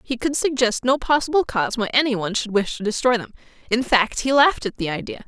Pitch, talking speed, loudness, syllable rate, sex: 240 Hz, 215 wpm, -20 LUFS, 6.1 syllables/s, female